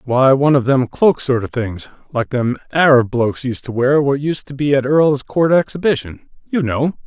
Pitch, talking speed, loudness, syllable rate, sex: 135 Hz, 195 wpm, -16 LUFS, 5.0 syllables/s, male